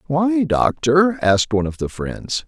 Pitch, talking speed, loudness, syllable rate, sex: 150 Hz, 170 wpm, -18 LUFS, 4.3 syllables/s, male